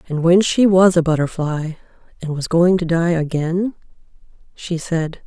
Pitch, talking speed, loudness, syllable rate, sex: 170 Hz, 160 wpm, -17 LUFS, 4.6 syllables/s, female